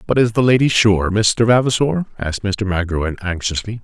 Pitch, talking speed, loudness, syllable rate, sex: 105 Hz, 170 wpm, -17 LUFS, 5.1 syllables/s, male